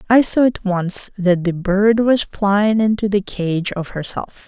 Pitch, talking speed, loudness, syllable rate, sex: 200 Hz, 190 wpm, -17 LUFS, 3.9 syllables/s, female